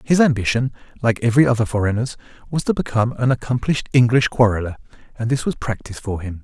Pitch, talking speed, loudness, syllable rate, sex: 120 Hz, 175 wpm, -19 LUFS, 6.9 syllables/s, male